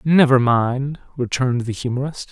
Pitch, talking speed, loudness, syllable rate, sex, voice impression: 130 Hz, 130 wpm, -19 LUFS, 5.0 syllables/s, male, masculine, adult-like, slightly powerful, unique, slightly intense